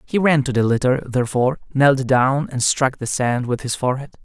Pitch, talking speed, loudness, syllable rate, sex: 130 Hz, 210 wpm, -19 LUFS, 5.5 syllables/s, male